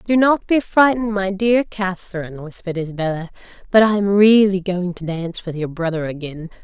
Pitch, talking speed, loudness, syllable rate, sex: 190 Hz, 180 wpm, -18 LUFS, 5.7 syllables/s, female